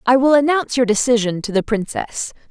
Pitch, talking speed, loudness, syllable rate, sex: 240 Hz, 190 wpm, -17 LUFS, 5.9 syllables/s, female